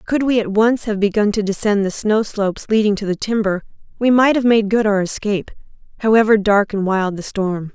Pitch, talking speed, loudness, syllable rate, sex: 210 Hz, 215 wpm, -17 LUFS, 5.5 syllables/s, female